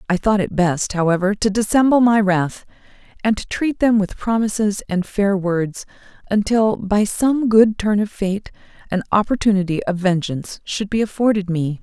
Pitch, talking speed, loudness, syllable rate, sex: 200 Hz, 165 wpm, -18 LUFS, 4.7 syllables/s, female